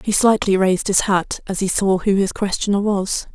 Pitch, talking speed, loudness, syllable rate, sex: 195 Hz, 215 wpm, -18 LUFS, 5.1 syllables/s, female